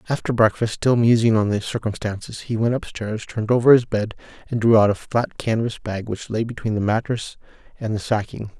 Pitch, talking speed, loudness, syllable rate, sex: 110 Hz, 200 wpm, -21 LUFS, 5.5 syllables/s, male